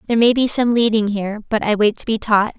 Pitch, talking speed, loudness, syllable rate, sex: 220 Hz, 280 wpm, -17 LUFS, 6.5 syllables/s, female